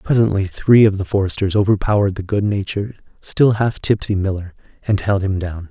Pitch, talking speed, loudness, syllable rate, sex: 100 Hz, 170 wpm, -17 LUFS, 5.7 syllables/s, male